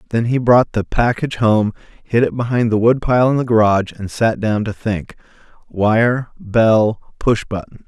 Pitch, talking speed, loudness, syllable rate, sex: 115 Hz, 150 wpm, -16 LUFS, 4.9 syllables/s, male